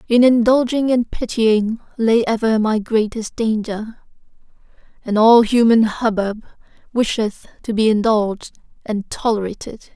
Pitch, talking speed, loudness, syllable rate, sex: 225 Hz, 115 wpm, -17 LUFS, 4.4 syllables/s, female